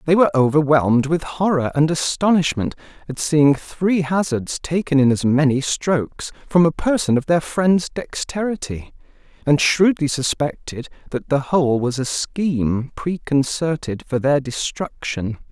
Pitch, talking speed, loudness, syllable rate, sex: 150 Hz, 140 wpm, -19 LUFS, 4.5 syllables/s, male